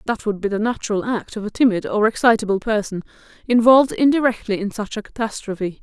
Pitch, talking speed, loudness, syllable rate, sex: 220 Hz, 185 wpm, -19 LUFS, 6.3 syllables/s, female